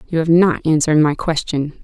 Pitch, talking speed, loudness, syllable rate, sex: 155 Hz, 195 wpm, -16 LUFS, 5.4 syllables/s, female